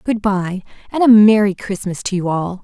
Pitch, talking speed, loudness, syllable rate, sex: 200 Hz, 205 wpm, -15 LUFS, 4.9 syllables/s, female